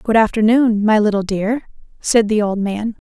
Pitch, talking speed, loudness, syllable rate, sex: 215 Hz, 175 wpm, -16 LUFS, 4.6 syllables/s, female